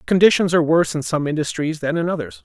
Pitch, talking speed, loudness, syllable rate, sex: 155 Hz, 220 wpm, -19 LUFS, 6.9 syllables/s, male